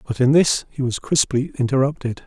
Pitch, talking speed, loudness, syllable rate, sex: 135 Hz, 185 wpm, -19 LUFS, 5.4 syllables/s, male